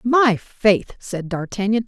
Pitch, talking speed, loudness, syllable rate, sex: 210 Hz, 130 wpm, -20 LUFS, 3.5 syllables/s, female